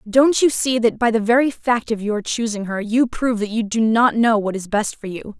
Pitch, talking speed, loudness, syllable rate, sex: 225 Hz, 265 wpm, -18 LUFS, 5.1 syllables/s, female